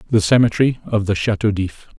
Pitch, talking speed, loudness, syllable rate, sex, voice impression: 105 Hz, 180 wpm, -18 LUFS, 6.3 syllables/s, male, masculine, adult-like, tensed, slightly powerful, hard, intellectual, slightly friendly, wild, lively, strict, slightly sharp